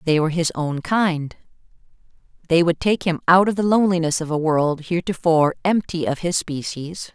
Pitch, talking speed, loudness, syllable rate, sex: 170 Hz, 175 wpm, -20 LUFS, 5.4 syllables/s, female